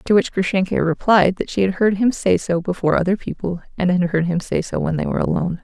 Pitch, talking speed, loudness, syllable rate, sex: 185 Hz, 255 wpm, -19 LUFS, 6.3 syllables/s, female